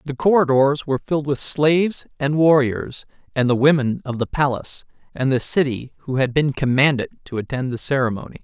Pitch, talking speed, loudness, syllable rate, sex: 140 Hz, 180 wpm, -20 LUFS, 5.6 syllables/s, male